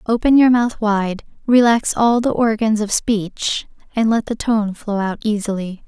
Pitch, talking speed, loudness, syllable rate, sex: 220 Hz, 175 wpm, -17 LUFS, 4.2 syllables/s, female